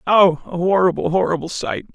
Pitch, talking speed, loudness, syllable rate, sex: 180 Hz, 155 wpm, -18 LUFS, 5.5 syllables/s, female